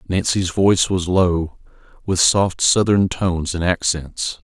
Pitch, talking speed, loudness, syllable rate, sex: 90 Hz, 135 wpm, -18 LUFS, 4.0 syllables/s, male